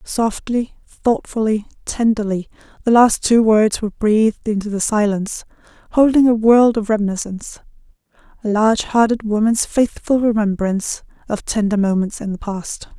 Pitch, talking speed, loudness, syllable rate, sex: 215 Hz, 130 wpm, -17 LUFS, 5.0 syllables/s, female